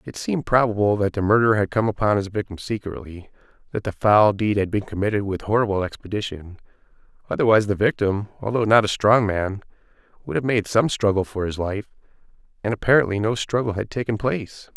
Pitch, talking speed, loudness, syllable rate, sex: 105 Hz, 185 wpm, -21 LUFS, 6.1 syllables/s, male